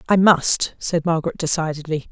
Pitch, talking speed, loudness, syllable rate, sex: 165 Hz, 140 wpm, -19 LUFS, 5.3 syllables/s, female